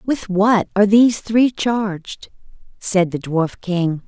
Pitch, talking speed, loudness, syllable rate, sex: 200 Hz, 145 wpm, -17 LUFS, 3.8 syllables/s, female